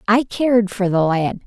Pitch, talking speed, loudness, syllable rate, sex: 205 Hz, 205 wpm, -18 LUFS, 4.7 syllables/s, female